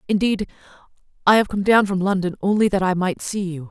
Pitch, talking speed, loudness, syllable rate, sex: 190 Hz, 210 wpm, -20 LUFS, 5.8 syllables/s, female